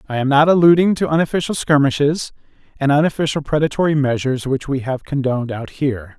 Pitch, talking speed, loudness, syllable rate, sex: 140 Hz, 165 wpm, -17 LUFS, 6.3 syllables/s, male